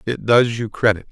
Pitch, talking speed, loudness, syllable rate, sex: 115 Hz, 215 wpm, -17 LUFS, 5.3 syllables/s, male